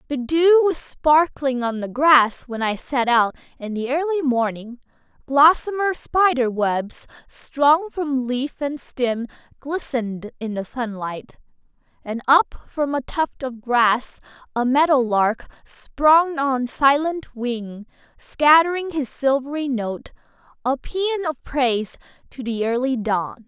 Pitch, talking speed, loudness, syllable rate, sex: 265 Hz, 135 wpm, -20 LUFS, 3.6 syllables/s, female